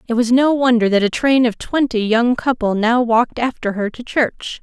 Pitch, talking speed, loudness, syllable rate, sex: 240 Hz, 220 wpm, -16 LUFS, 4.9 syllables/s, female